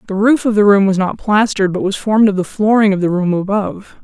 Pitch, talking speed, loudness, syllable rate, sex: 200 Hz, 270 wpm, -14 LUFS, 6.3 syllables/s, female